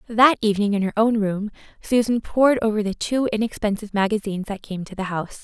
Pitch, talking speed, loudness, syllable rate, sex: 210 Hz, 200 wpm, -21 LUFS, 6.5 syllables/s, female